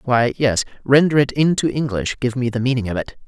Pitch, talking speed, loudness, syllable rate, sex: 125 Hz, 200 wpm, -18 LUFS, 5.6 syllables/s, male